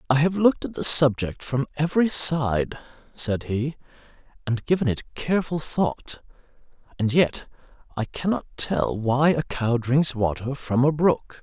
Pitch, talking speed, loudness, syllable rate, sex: 140 Hz, 150 wpm, -23 LUFS, 4.4 syllables/s, male